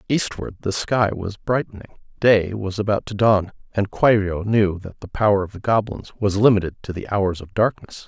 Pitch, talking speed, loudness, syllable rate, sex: 100 Hz, 195 wpm, -20 LUFS, 5.1 syllables/s, male